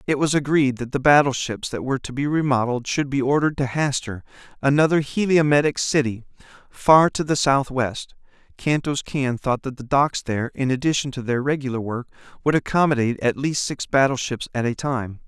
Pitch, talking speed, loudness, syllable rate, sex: 135 Hz, 175 wpm, -21 LUFS, 5.5 syllables/s, male